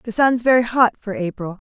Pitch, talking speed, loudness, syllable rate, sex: 220 Hz, 215 wpm, -18 LUFS, 5.5 syllables/s, female